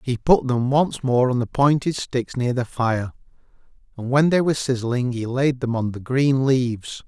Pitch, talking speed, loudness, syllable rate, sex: 130 Hz, 205 wpm, -21 LUFS, 4.6 syllables/s, male